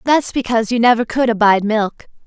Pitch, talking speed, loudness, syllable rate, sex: 230 Hz, 185 wpm, -15 LUFS, 6.1 syllables/s, female